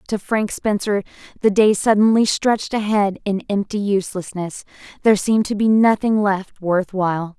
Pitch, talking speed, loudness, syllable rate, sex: 205 Hz, 145 wpm, -18 LUFS, 5.1 syllables/s, female